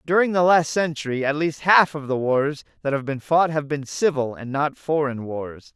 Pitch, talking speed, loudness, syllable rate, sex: 145 Hz, 220 wpm, -22 LUFS, 4.8 syllables/s, male